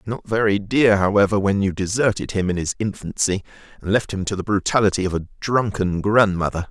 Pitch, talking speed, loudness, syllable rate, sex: 100 Hz, 190 wpm, -20 LUFS, 5.6 syllables/s, male